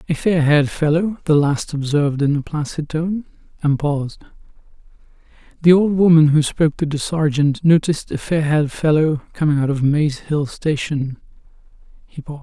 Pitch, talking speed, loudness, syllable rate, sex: 150 Hz, 165 wpm, -18 LUFS, 5.3 syllables/s, male